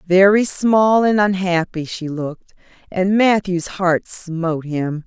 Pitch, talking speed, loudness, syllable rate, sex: 185 Hz, 130 wpm, -17 LUFS, 3.7 syllables/s, female